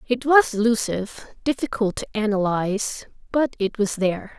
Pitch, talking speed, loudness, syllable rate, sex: 220 Hz, 135 wpm, -22 LUFS, 5.2 syllables/s, female